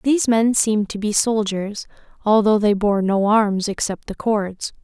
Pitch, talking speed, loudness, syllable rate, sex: 210 Hz, 175 wpm, -19 LUFS, 4.4 syllables/s, female